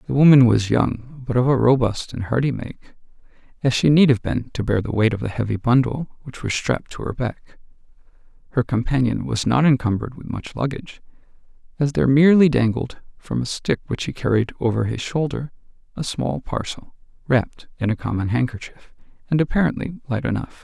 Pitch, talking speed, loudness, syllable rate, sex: 125 Hz, 185 wpm, -21 LUFS, 5.6 syllables/s, male